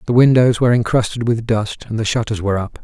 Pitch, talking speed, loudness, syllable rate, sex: 115 Hz, 235 wpm, -16 LUFS, 6.4 syllables/s, male